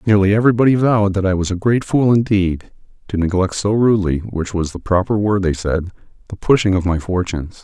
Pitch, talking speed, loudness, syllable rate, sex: 100 Hz, 190 wpm, -17 LUFS, 6.0 syllables/s, male